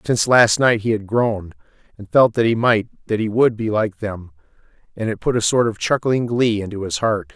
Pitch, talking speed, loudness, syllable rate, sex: 110 Hz, 230 wpm, -18 LUFS, 5.3 syllables/s, male